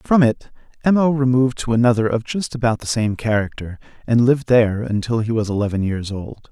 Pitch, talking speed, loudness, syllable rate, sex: 115 Hz, 205 wpm, -19 LUFS, 5.8 syllables/s, male